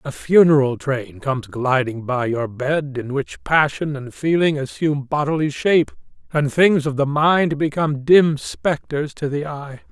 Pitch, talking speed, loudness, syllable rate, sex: 145 Hz, 165 wpm, -19 LUFS, 4.4 syllables/s, male